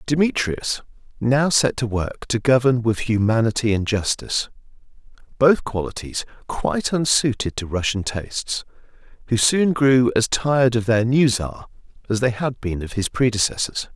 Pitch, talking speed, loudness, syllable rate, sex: 120 Hz, 145 wpm, -20 LUFS, 4.7 syllables/s, male